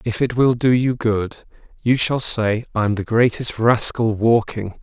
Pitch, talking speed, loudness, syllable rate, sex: 115 Hz, 175 wpm, -18 LUFS, 4.0 syllables/s, male